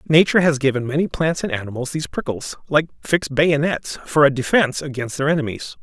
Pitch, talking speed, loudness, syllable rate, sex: 145 Hz, 185 wpm, -20 LUFS, 6.3 syllables/s, male